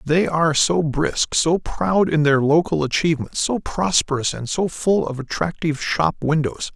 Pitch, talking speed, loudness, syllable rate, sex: 155 Hz, 170 wpm, -20 LUFS, 4.6 syllables/s, male